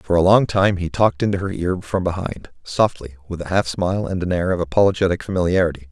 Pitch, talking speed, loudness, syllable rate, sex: 90 Hz, 225 wpm, -19 LUFS, 6.2 syllables/s, male